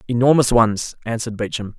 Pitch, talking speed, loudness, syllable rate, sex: 115 Hz, 135 wpm, -18 LUFS, 5.8 syllables/s, male